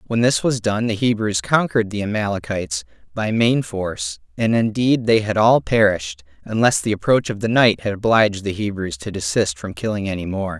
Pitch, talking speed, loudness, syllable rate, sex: 105 Hz, 195 wpm, -19 LUFS, 5.4 syllables/s, male